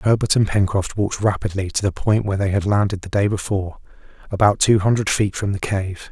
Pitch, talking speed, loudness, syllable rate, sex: 100 Hz, 215 wpm, -19 LUFS, 5.9 syllables/s, male